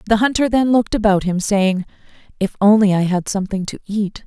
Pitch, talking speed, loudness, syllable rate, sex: 205 Hz, 195 wpm, -17 LUFS, 5.8 syllables/s, female